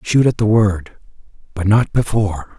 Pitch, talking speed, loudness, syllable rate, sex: 105 Hz, 165 wpm, -16 LUFS, 4.8 syllables/s, male